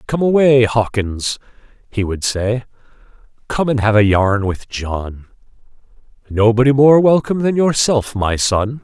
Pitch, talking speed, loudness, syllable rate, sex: 120 Hz, 135 wpm, -15 LUFS, 4.3 syllables/s, male